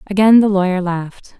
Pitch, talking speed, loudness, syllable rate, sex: 195 Hz, 170 wpm, -14 LUFS, 5.5 syllables/s, female